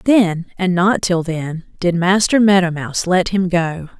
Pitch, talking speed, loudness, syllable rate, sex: 180 Hz, 150 wpm, -16 LUFS, 4.2 syllables/s, female